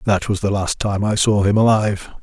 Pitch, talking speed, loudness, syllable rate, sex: 100 Hz, 240 wpm, -18 LUFS, 5.5 syllables/s, male